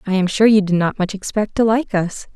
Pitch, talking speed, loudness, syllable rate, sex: 200 Hz, 280 wpm, -17 LUFS, 5.6 syllables/s, female